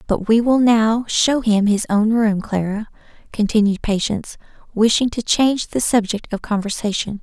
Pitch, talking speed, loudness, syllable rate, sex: 220 Hz, 160 wpm, -18 LUFS, 4.8 syllables/s, female